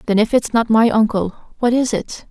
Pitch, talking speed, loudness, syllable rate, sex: 225 Hz, 235 wpm, -17 LUFS, 5.2 syllables/s, female